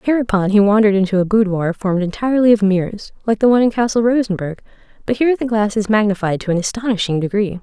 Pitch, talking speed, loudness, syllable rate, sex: 210 Hz, 195 wpm, -16 LUFS, 7.0 syllables/s, female